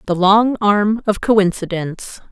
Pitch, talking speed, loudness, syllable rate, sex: 200 Hz, 130 wpm, -16 LUFS, 4.0 syllables/s, female